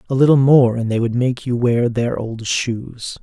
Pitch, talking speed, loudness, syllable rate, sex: 120 Hz, 225 wpm, -17 LUFS, 4.3 syllables/s, male